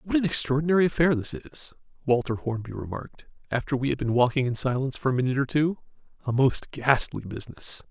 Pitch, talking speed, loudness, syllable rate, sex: 135 Hz, 190 wpm, -26 LUFS, 6.3 syllables/s, male